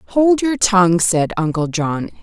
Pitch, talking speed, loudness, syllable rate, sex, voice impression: 195 Hz, 160 wpm, -16 LUFS, 4.2 syllables/s, female, feminine, very adult-like, slightly fluent, slightly intellectual, slightly elegant